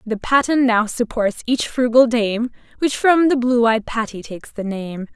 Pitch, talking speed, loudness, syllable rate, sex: 235 Hz, 185 wpm, -18 LUFS, 4.5 syllables/s, female